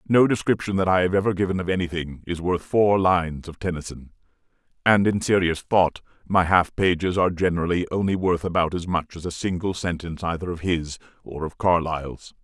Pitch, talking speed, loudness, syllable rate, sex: 90 Hz, 190 wpm, -23 LUFS, 5.7 syllables/s, male